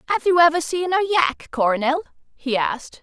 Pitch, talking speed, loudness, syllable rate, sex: 305 Hz, 180 wpm, -20 LUFS, 6.5 syllables/s, female